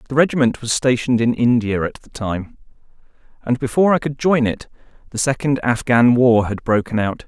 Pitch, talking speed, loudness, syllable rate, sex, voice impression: 125 Hz, 180 wpm, -18 LUFS, 5.5 syllables/s, male, masculine, adult-like, cool, slightly refreshing, sincere, slightly calm